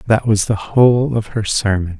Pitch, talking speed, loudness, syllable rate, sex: 105 Hz, 210 wpm, -16 LUFS, 4.9 syllables/s, male